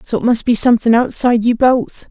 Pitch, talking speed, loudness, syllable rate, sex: 235 Hz, 230 wpm, -13 LUFS, 6.0 syllables/s, female